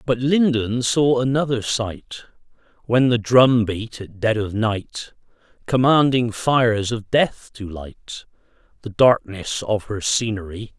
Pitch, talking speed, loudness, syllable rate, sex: 115 Hz, 135 wpm, -19 LUFS, 3.8 syllables/s, male